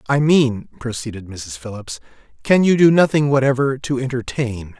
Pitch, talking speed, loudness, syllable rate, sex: 130 Hz, 150 wpm, -17 LUFS, 4.9 syllables/s, male